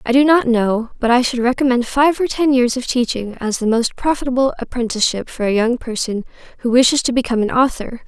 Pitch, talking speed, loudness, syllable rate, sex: 245 Hz, 215 wpm, -17 LUFS, 5.8 syllables/s, female